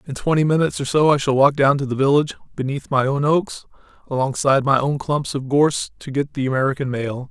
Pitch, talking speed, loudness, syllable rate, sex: 140 Hz, 220 wpm, -19 LUFS, 6.1 syllables/s, male